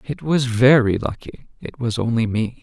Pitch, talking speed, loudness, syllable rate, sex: 120 Hz, 185 wpm, -19 LUFS, 4.5 syllables/s, male